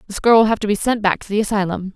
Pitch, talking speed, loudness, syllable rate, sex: 210 Hz, 335 wpm, -17 LUFS, 7.3 syllables/s, female